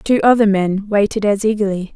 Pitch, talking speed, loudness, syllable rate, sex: 205 Hz, 185 wpm, -16 LUFS, 5.5 syllables/s, female